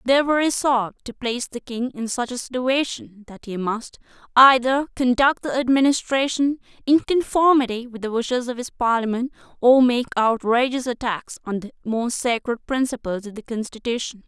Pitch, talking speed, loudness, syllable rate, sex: 245 Hz, 160 wpm, -21 LUFS, 5.2 syllables/s, female